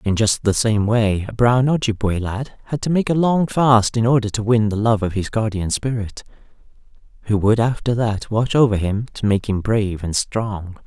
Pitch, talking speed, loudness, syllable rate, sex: 110 Hz, 210 wpm, -19 LUFS, 4.9 syllables/s, male